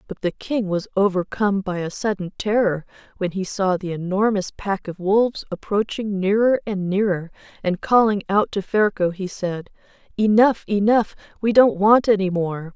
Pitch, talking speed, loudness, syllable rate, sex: 200 Hz, 165 wpm, -21 LUFS, 4.8 syllables/s, female